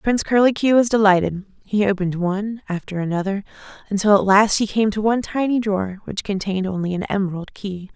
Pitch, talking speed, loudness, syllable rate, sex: 200 Hz, 180 wpm, -20 LUFS, 6.2 syllables/s, female